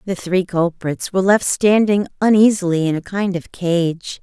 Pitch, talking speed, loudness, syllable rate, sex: 185 Hz, 170 wpm, -17 LUFS, 4.6 syllables/s, female